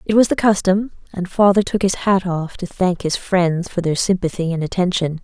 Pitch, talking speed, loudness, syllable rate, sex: 185 Hz, 220 wpm, -18 LUFS, 5.1 syllables/s, female